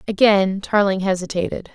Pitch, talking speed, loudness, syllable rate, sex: 195 Hz, 105 wpm, -19 LUFS, 5.2 syllables/s, female